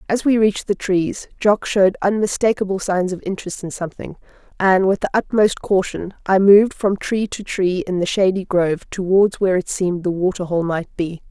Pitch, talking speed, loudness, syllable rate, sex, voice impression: 190 Hz, 195 wpm, -18 LUFS, 5.4 syllables/s, female, feminine, adult-like, tensed, powerful, slightly hard, slightly muffled, raspy, intellectual, calm, friendly, reassuring, unique, slightly lively, slightly kind